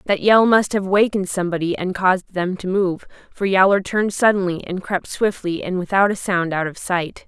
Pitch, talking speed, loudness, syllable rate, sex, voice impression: 190 Hz, 205 wpm, -19 LUFS, 5.4 syllables/s, female, feminine, adult-like, slightly powerful, slightly hard, clear, fluent, intellectual, calm, unique, slightly lively, sharp, slightly light